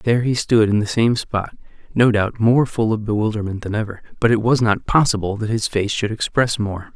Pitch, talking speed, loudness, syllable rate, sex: 110 Hz, 225 wpm, -19 LUFS, 5.4 syllables/s, male